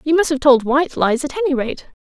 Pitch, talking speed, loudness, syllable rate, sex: 285 Hz, 265 wpm, -17 LUFS, 6.0 syllables/s, female